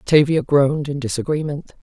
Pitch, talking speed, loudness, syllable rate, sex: 145 Hz, 125 wpm, -19 LUFS, 5.3 syllables/s, female